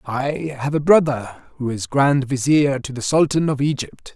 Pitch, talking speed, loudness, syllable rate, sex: 135 Hz, 190 wpm, -19 LUFS, 4.4 syllables/s, male